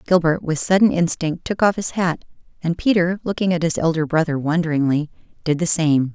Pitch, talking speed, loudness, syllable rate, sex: 165 Hz, 185 wpm, -19 LUFS, 5.5 syllables/s, female